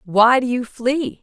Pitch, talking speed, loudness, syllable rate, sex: 245 Hz, 195 wpm, -18 LUFS, 3.6 syllables/s, female